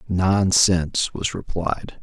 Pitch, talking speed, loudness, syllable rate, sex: 90 Hz, 90 wpm, -20 LUFS, 3.2 syllables/s, male